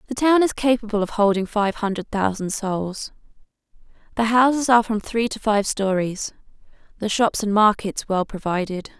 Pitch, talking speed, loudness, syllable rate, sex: 215 Hz, 160 wpm, -21 LUFS, 5.0 syllables/s, female